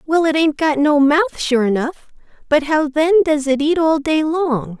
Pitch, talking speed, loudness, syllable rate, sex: 295 Hz, 215 wpm, -16 LUFS, 4.7 syllables/s, female